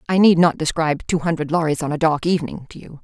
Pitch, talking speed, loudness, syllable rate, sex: 160 Hz, 255 wpm, -19 LUFS, 6.7 syllables/s, female